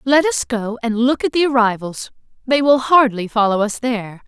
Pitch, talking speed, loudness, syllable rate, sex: 240 Hz, 195 wpm, -17 LUFS, 5.1 syllables/s, female